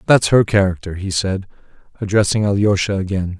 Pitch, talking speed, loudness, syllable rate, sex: 100 Hz, 140 wpm, -17 LUFS, 5.6 syllables/s, male